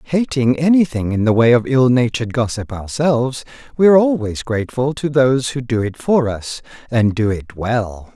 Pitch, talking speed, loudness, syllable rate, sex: 125 Hz, 185 wpm, -17 LUFS, 5.1 syllables/s, male